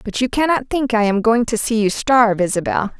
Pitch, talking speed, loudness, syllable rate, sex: 230 Hz, 240 wpm, -17 LUFS, 5.6 syllables/s, female